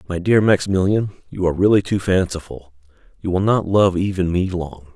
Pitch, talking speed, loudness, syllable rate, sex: 90 Hz, 180 wpm, -18 LUFS, 5.6 syllables/s, male